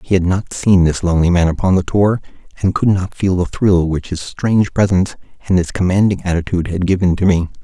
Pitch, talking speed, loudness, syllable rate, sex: 90 Hz, 220 wpm, -16 LUFS, 5.9 syllables/s, male